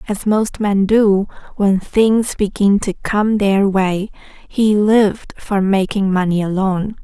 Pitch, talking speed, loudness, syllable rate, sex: 200 Hz, 145 wpm, -16 LUFS, 3.7 syllables/s, female